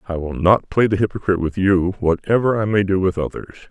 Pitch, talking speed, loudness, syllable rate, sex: 95 Hz, 225 wpm, -18 LUFS, 5.6 syllables/s, male